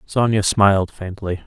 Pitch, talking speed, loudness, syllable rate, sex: 100 Hz, 125 wpm, -18 LUFS, 4.6 syllables/s, male